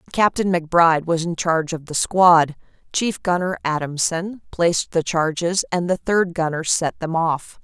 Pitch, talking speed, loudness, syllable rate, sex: 170 Hz, 165 wpm, -20 LUFS, 4.6 syllables/s, female